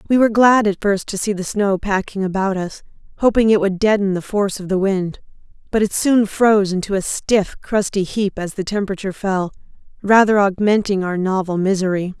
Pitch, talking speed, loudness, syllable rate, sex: 200 Hz, 190 wpm, -18 LUFS, 5.5 syllables/s, female